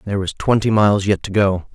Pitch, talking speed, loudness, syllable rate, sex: 100 Hz, 240 wpm, -17 LUFS, 6.3 syllables/s, male